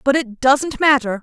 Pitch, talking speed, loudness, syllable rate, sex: 265 Hz, 195 wpm, -16 LUFS, 4.4 syllables/s, female